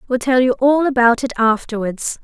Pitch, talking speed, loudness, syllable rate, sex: 245 Hz, 190 wpm, -16 LUFS, 5.2 syllables/s, female